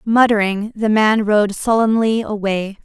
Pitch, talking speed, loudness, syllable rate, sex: 215 Hz, 125 wpm, -16 LUFS, 4.1 syllables/s, female